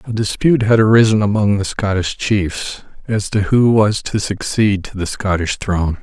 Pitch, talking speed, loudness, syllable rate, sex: 105 Hz, 180 wpm, -16 LUFS, 4.8 syllables/s, male